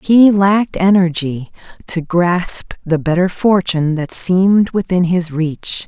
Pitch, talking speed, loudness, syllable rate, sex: 180 Hz, 135 wpm, -15 LUFS, 4.0 syllables/s, female